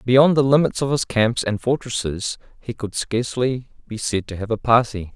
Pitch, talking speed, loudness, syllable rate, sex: 120 Hz, 200 wpm, -20 LUFS, 4.9 syllables/s, male